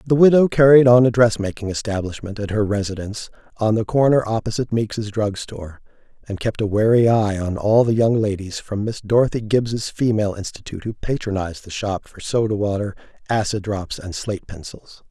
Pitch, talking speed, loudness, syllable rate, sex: 110 Hz, 185 wpm, -19 LUFS, 5.6 syllables/s, male